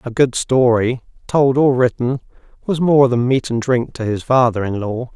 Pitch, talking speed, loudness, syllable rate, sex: 125 Hz, 200 wpm, -17 LUFS, 4.6 syllables/s, male